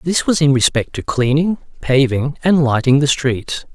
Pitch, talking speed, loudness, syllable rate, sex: 140 Hz, 175 wpm, -16 LUFS, 4.6 syllables/s, male